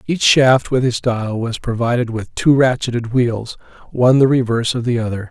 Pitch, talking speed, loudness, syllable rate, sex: 120 Hz, 190 wpm, -16 LUFS, 5.0 syllables/s, male